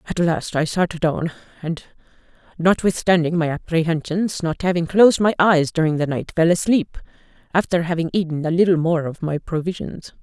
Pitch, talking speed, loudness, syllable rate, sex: 170 Hz, 165 wpm, -20 LUFS, 5.2 syllables/s, female